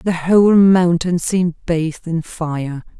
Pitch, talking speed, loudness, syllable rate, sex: 170 Hz, 140 wpm, -16 LUFS, 4.2 syllables/s, female